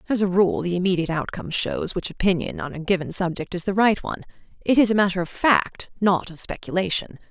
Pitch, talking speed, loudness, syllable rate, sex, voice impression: 190 Hz, 215 wpm, -22 LUFS, 6.1 syllables/s, female, feminine, adult-like, fluent, slightly intellectual